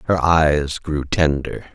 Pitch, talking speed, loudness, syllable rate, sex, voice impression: 75 Hz, 135 wpm, -18 LUFS, 3.2 syllables/s, male, masculine, adult-like, thick, fluent, cool, slightly refreshing, sincere